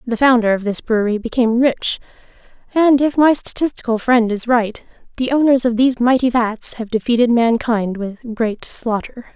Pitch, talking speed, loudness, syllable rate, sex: 235 Hz, 165 wpm, -16 LUFS, 5.0 syllables/s, female